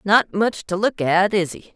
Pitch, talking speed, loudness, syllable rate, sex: 190 Hz, 240 wpm, -20 LUFS, 4.2 syllables/s, female